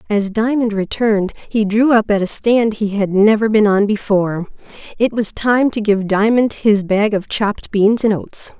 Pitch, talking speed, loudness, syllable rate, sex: 210 Hz, 195 wpm, -15 LUFS, 4.6 syllables/s, female